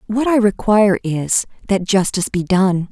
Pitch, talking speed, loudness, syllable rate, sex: 200 Hz, 165 wpm, -16 LUFS, 4.8 syllables/s, female